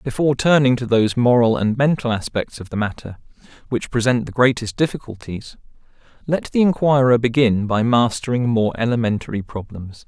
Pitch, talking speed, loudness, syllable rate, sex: 120 Hz, 150 wpm, -19 LUFS, 5.4 syllables/s, male